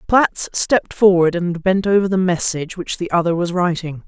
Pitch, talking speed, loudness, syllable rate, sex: 180 Hz, 190 wpm, -17 LUFS, 5.2 syllables/s, female